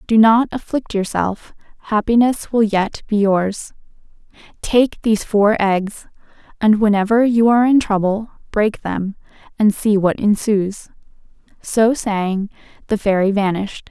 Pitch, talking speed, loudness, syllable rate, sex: 210 Hz, 130 wpm, -17 LUFS, 4.2 syllables/s, female